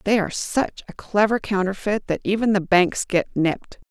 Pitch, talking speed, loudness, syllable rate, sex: 195 Hz, 185 wpm, -21 LUFS, 5.1 syllables/s, female